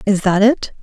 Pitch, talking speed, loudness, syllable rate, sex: 205 Hz, 215 wpm, -14 LUFS, 4.6 syllables/s, female